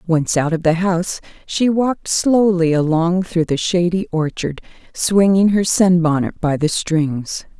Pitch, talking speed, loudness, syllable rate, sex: 175 Hz, 150 wpm, -17 LUFS, 4.2 syllables/s, female